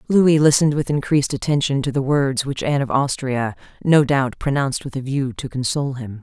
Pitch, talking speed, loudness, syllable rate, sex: 135 Hz, 200 wpm, -19 LUFS, 5.7 syllables/s, female